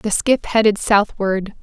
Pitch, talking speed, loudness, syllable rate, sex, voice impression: 210 Hz, 150 wpm, -17 LUFS, 3.9 syllables/s, female, feminine, adult-like, slightly dark, calm, slightly reassuring